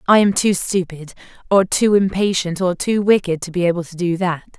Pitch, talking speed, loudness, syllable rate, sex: 185 Hz, 210 wpm, -17 LUFS, 5.2 syllables/s, female